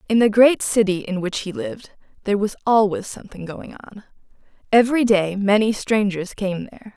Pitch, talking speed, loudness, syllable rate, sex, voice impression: 210 Hz, 170 wpm, -19 LUFS, 5.5 syllables/s, female, feminine, slightly young, clear, slightly fluent, slightly cute, friendly, slightly kind